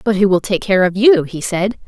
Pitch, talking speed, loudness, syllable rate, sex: 200 Hz, 290 wpm, -15 LUFS, 5.2 syllables/s, female